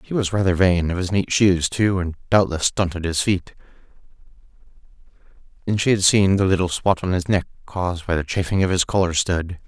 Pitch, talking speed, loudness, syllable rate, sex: 90 Hz, 200 wpm, -20 LUFS, 5.5 syllables/s, male